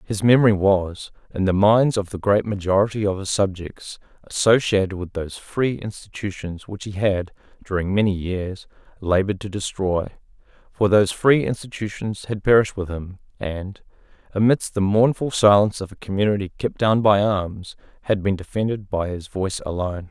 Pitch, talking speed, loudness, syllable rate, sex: 100 Hz, 160 wpm, -21 LUFS, 5.2 syllables/s, male